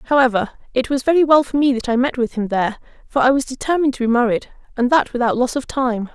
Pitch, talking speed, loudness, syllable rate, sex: 255 Hz, 255 wpm, -18 LUFS, 6.4 syllables/s, female